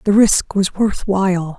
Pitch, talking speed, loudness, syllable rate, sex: 195 Hz, 190 wpm, -16 LUFS, 4.1 syllables/s, female